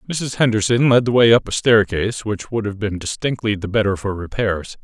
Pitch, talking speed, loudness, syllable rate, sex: 110 Hz, 210 wpm, -18 LUFS, 5.5 syllables/s, male